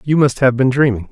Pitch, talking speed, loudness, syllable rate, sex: 130 Hz, 270 wpm, -14 LUFS, 5.9 syllables/s, male